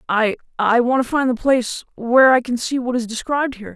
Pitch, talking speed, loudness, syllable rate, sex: 245 Hz, 210 wpm, -18 LUFS, 6.2 syllables/s, female